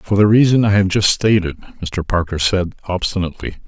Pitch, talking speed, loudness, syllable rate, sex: 95 Hz, 180 wpm, -16 LUFS, 5.3 syllables/s, male